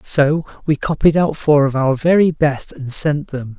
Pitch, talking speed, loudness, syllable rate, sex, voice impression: 145 Hz, 200 wpm, -16 LUFS, 4.3 syllables/s, male, very masculine, slightly old, very thick, slightly tensed, slightly weak, slightly bright, slightly soft, clear, fluent, slightly cool, intellectual, slightly refreshing, sincere, calm, mature, slightly friendly, slightly reassuring, slightly unique, slightly elegant, wild, sweet, slightly lively, kind, modest